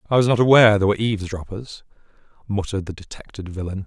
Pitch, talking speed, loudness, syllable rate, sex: 100 Hz, 170 wpm, -19 LUFS, 7.6 syllables/s, male